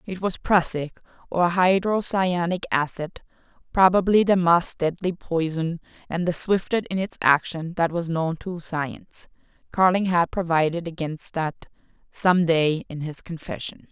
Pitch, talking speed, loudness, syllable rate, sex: 170 Hz, 135 wpm, -23 LUFS, 4.3 syllables/s, female